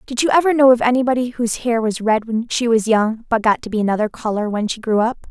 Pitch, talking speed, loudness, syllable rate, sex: 230 Hz, 270 wpm, -17 LUFS, 6.3 syllables/s, female